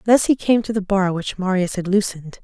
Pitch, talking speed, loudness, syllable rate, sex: 195 Hz, 245 wpm, -19 LUFS, 5.7 syllables/s, female